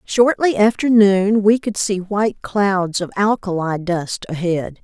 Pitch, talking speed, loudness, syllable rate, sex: 200 Hz, 150 wpm, -17 LUFS, 3.9 syllables/s, female